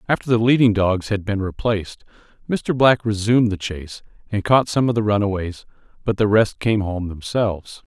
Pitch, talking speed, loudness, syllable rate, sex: 105 Hz, 180 wpm, -19 LUFS, 5.3 syllables/s, male